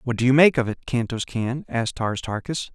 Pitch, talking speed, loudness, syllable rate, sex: 125 Hz, 240 wpm, -22 LUFS, 5.5 syllables/s, male